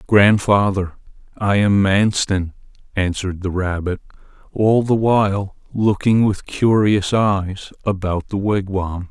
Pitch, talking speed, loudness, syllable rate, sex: 100 Hz, 110 wpm, -18 LUFS, 3.9 syllables/s, male